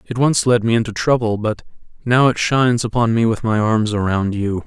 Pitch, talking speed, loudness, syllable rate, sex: 115 Hz, 220 wpm, -17 LUFS, 5.3 syllables/s, male